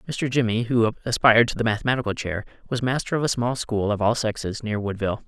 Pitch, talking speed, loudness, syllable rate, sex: 115 Hz, 215 wpm, -23 LUFS, 6.4 syllables/s, male